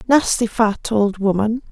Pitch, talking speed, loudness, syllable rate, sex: 220 Hz, 140 wpm, -18 LUFS, 4.1 syllables/s, female